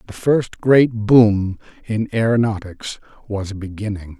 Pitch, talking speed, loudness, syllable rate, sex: 105 Hz, 115 wpm, -18 LUFS, 3.8 syllables/s, male